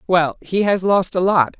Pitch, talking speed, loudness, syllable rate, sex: 180 Hz, 190 wpm, -17 LUFS, 4.4 syllables/s, female